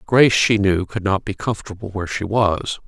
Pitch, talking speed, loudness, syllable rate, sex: 100 Hz, 210 wpm, -19 LUFS, 5.6 syllables/s, male